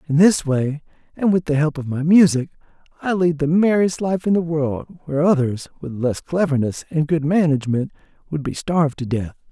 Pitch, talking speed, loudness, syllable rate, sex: 155 Hz, 195 wpm, -19 LUFS, 5.3 syllables/s, male